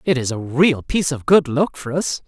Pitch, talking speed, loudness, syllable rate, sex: 145 Hz, 265 wpm, -18 LUFS, 5.1 syllables/s, male